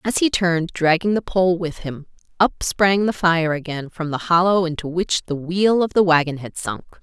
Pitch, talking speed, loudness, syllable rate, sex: 175 Hz, 215 wpm, -19 LUFS, 4.8 syllables/s, female